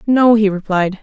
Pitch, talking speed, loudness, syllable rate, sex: 210 Hz, 175 wpm, -14 LUFS, 4.6 syllables/s, female